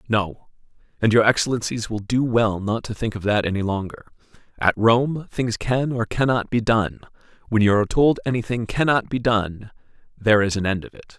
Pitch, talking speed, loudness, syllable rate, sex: 110 Hz, 195 wpm, -21 LUFS, 5.4 syllables/s, male